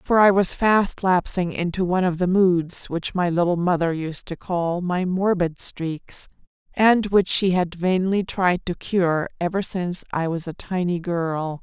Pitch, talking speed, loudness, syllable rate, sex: 180 Hz, 180 wpm, -22 LUFS, 4.1 syllables/s, female